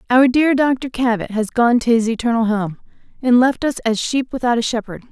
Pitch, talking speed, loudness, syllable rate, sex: 240 Hz, 210 wpm, -17 LUFS, 5.3 syllables/s, female